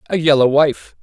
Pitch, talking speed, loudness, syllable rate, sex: 150 Hz, 175 wpm, -14 LUFS, 5.1 syllables/s, male